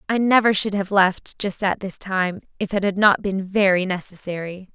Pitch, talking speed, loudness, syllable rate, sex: 195 Hz, 200 wpm, -20 LUFS, 4.8 syllables/s, female